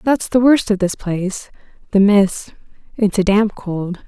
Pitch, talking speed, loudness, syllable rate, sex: 205 Hz, 145 wpm, -16 LUFS, 4.2 syllables/s, female